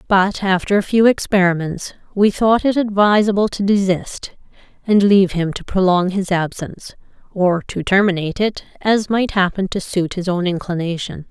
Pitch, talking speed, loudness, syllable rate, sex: 190 Hz, 160 wpm, -17 LUFS, 5.0 syllables/s, female